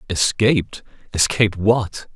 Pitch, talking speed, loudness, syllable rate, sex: 105 Hz, 85 wpm, -18 LUFS, 4.2 syllables/s, male